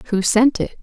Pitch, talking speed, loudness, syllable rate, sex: 230 Hz, 215 wpm, -17 LUFS, 3.9 syllables/s, female